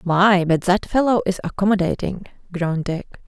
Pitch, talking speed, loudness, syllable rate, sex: 195 Hz, 145 wpm, -20 LUFS, 5.2 syllables/s, female